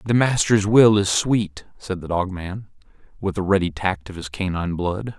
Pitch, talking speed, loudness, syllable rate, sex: 95 Hz, 195 wpm, -21 LUFS, 4.7 syllables/s, male